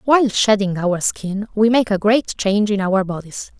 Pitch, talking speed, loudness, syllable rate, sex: 205 Hz, 200 wpm, -18 LUFS, 4.8 syllables/s, female